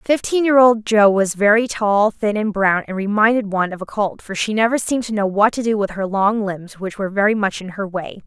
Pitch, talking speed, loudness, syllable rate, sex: 210 Hz, 260 wpm, -18 LUFS, 5.6 syllables/s, female